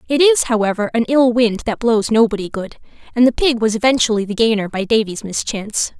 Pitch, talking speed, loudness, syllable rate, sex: 225 Hz, 200 wpm, -16 LUFS, 5.8 syllables/s, female